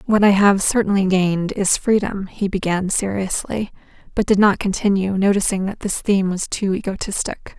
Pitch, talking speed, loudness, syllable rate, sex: 195 Hz, 165 wpm, -19 LUFS, 5.1 syllables/s, female